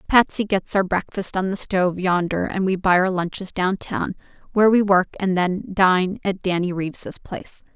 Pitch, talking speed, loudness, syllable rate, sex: 190 Hz, 195 wpm, -21 LUFS, 4.9 syllables/s, female